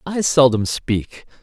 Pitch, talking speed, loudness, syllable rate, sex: 135 Hz, 125 wpm, -18 LUFS, 3.4 syllables/s, male